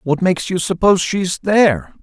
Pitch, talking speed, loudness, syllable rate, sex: 180 Hz, 205 wpm, -16 LUFS, 6.0 syllables/s, male